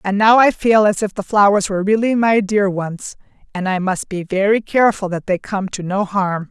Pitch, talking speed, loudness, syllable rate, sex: 200 Hz, 230 wpm, -16 LUFS, 5.1 syllables/s, female